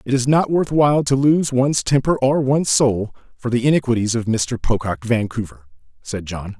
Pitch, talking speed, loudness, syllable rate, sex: 125 Hz, 190 wpm, -18 LUFS, 5.2 syllables/s, male